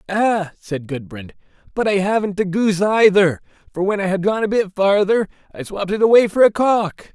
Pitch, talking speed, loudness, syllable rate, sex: 195 Hz, 200 wpm, -17 LUFS, 5.2 syllables/s, male